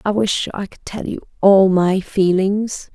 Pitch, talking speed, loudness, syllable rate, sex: 195 Hz, 185 wpm, -17 LUFS, 3.8 syllables/s, female